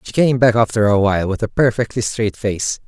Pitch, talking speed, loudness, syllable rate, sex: 110 Hz, 230 wpm, -17 LUFS, 5.5 syllables/s, male